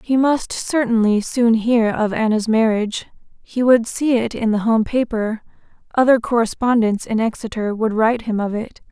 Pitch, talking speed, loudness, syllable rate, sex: 225 Hz, 170 wpm, -18 LUFS, 4.8 syllables/s, female